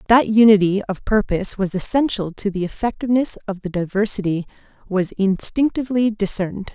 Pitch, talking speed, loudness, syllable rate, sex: 205 Hz, 135 wpm, -19 LUFS, 5.7 syllables/s, female